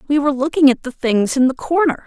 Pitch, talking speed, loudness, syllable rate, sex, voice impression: 280 Hz, 260 wpm, -16 LUFS, 6.3 syllables/s, female, very feminine, very young, very thin, very tensed, very powerful, bright, very hard, very clear, very fluent, raspy, very cute, slightly cool, intellectual, very refreshing, slightly sincere, slightly calm, friendly, reassuring, very unique, slightly elegant, very wild, sweet, very lively, very strict, intense, very sharp, very light